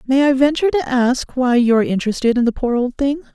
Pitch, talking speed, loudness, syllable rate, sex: 255 Hz, 250 wpm, -17 LUFS, 6.7 syllables/s, female